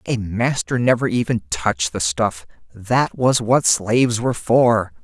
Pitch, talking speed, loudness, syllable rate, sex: 110 Hz, 155 wpm, -18 LUFS, 4.2 syllables/s, male